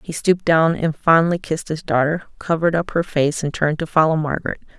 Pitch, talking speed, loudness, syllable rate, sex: 160 Hz, 215 wpm, -19 LUFS, 6.2 syllables/s, female